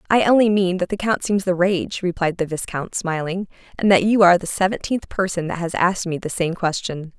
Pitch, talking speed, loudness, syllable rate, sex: 185 Hz, 225 wpm, -20 LUFS, 5.6 syllables/s, female